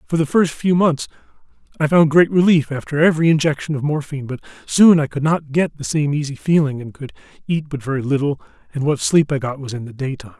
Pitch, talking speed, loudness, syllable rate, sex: 145 Hz, 225 wpm, -18 LUFS, 6.2 syllables/s, male